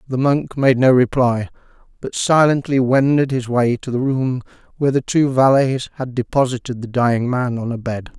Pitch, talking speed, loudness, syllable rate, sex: 130 Hz, 185 wpm, -17 LUFS, 5.0 syllables/s, male